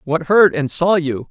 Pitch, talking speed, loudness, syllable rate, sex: 165 Hz, 230 wpm, -15 LUFS, 4.1 syllables/s, male